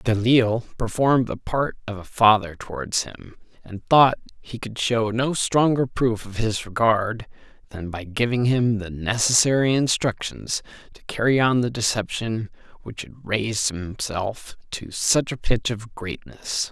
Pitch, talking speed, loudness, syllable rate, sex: 110 Hz, 150 wpm, -22 LUFS, 4.2 syllables/s, male